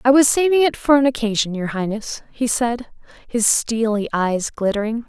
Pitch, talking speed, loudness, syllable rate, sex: 235 Hz, 175 wpm, -19 LUFS, 4.9 syllables/s, female